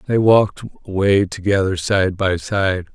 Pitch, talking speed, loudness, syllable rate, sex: 100 Hz, 145 wpm, -17 LUFS, 4.5 syllables/s, male